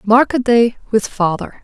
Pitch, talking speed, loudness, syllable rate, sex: 225 Hz, 145 wpm, -15 LUFS, 4.3 syllables/s, female